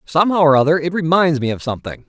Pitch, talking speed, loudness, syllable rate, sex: 155 Hz, 230 wpm, -16 LUFS, 7.1 syllables/s, male